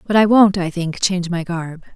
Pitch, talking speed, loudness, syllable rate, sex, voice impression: 180 Hz, 245 wpm, -17 LUFS, 5.3 syllables/s, female, very masculine, slightly adult-like, slightly thin, slightly relaxed, slightly weak, slightly dark, slightly hard, clear, fluent, slightly raspy, cute, intellectual, very refreshing, sincere, calm, mature, very friendly, reassuring, unique, elegant, slightly wild, very sweet, lively, kind, slightly sharp, light